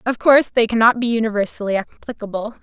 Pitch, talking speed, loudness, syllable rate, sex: 225 Hz, 160 wpm, -17 LUFS, 6.5 syllables/s, female